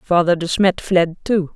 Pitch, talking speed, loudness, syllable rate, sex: 180 Hz, 190 wpm, -17 LUFS, 4.2 syllables/s, female